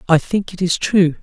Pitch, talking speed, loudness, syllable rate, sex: 175 Hz, 245 wpm, -17 LUFS, 4.9 syllables/s, male